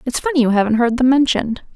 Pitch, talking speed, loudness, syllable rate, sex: 250 Hz, 240 wpm, -16 LUFS, 7.0 syllables/s, female